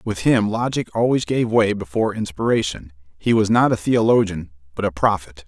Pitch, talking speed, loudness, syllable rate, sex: 100 Hz, 175 wpm, -19 LUFS, 5.4 syllables/s, male